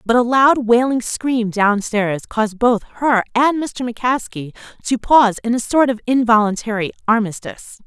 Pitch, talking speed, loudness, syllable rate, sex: 230 Hz, 155 wpm, -17 LUFS, 4.9 syllables/s, female